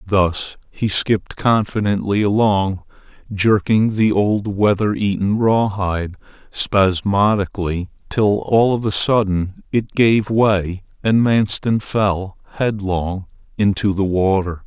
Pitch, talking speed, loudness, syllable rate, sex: 100 Hz, 110 wpm, -18 LUFS, 3.6 syllables/s, male